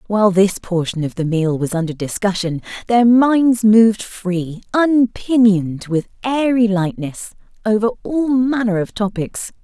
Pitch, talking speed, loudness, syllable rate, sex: 210 Hz, 135 wpm, -17 LUFS, 4.3 syllables/s, female